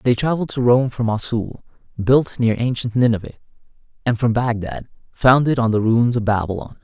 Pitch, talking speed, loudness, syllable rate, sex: 120 Hz, 165 wpm, -19 LUFS, 5.5 syllables/s, male